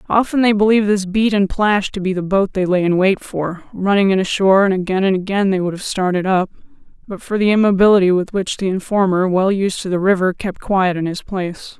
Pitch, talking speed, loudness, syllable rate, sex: 190 Hz, 235 wpm, -16 LUFS, 5.8 syllables/s, female